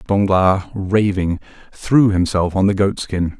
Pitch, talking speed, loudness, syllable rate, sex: 95 Hz, 140 wpm, -17 LUFS, 3.9 syllables/s, male